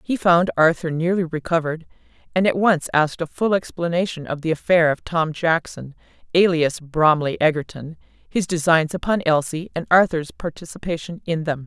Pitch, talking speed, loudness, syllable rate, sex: 165 Hz, 155 wpm, -20 LUFS, 5.1 syllables/s, female